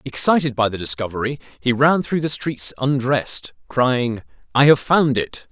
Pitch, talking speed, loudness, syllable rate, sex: 125 Hz, 165 wpm, -19 LUFS, 4.6 syllables/s, male